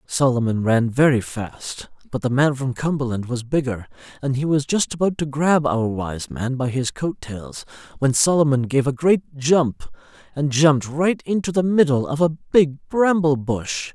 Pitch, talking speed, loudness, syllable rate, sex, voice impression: 140 Hz, 180 wpm, -20 LUFS, 4.5 syllables/s, male, very masculine, adult-like, slightly cool, slightly calm, slightly reassuring, slightly kind